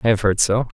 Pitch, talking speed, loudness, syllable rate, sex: 105 Hz, 305 wpm, -18 LUFS, 6.6 syllables/s, male